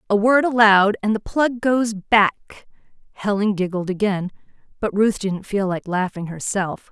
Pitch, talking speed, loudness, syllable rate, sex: 205 Hz, 155 wpm, -19 LUFS, 4.2 syllables/s, female